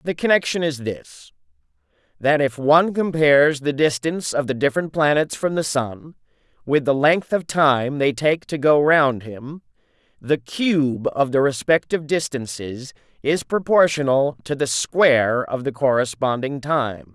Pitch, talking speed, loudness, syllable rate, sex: 145 Hz, 150 wpm, -20 LUFS, 4.5 syllables/s, male